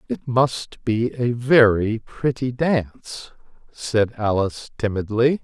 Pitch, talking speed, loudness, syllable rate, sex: 115 Hz, 110 wpm, -21 LUFS, 3.6 syllables/s, male